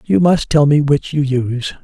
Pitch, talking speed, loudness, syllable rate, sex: 140 Hz, 230 wpm, -15 LUFS, 4.8 syllables/s, male